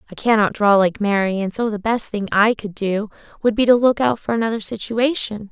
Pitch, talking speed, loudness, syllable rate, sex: 215 Hz, 230 wpm, -19 LUFS, 5.5 syllables/s, female